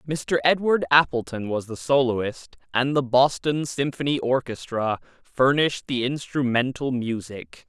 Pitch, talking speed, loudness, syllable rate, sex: 130 Hz, 115 wpm, -23 LUFS, 4.3 syllables/s, male